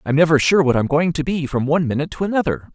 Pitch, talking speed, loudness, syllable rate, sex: 155 Hz, 285 wpm, -18 LUFS, 7.3 syllables/s, male